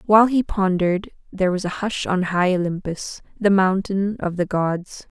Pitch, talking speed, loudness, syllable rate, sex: 190 Hz, 175 wpm, -21 LUFS, 4.7 syllables/s, female